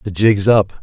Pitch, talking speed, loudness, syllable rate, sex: 105 Hz, 215 wpm, -14 LUFS, 4.1 syllables/s, male